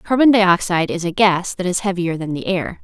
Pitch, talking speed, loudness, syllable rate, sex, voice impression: 185 Hz, 230 wpm, -17 LUFS, 5.4 syllables/s, female, feminine, adult-like, slightly fluent, sincere, slightly friendly, slightly lively